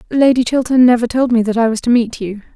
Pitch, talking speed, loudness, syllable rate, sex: 235 Hz, 260 wpm, -13 LUFS, 6.3 syllables/s, female